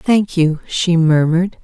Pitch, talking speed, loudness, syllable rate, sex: 170 Hz, 145 wpm, -15 LUFS, 4.0 syllables/s, female